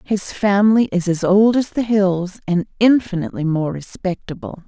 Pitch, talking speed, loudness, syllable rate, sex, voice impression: 195 Hz, 155 wpm, -18 LUFS, 4.8 syllables/s, female, feminine, middle-aged, tensed, powerful, slightly hard, slightly halting, raspy, intellectual, calm, friendly, slightly reassuring, elegant, lively, strict, sharp